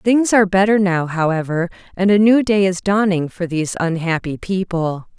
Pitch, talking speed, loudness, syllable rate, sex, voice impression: 185 Hz, 175 wpm, -17 LUFS, 5.0 syllables/s, female, feminine, middle-aged, tensed, powerful, clear, fluent, intellectual, calm, friendly, slightly reassuring, elegant, lively, slightly strict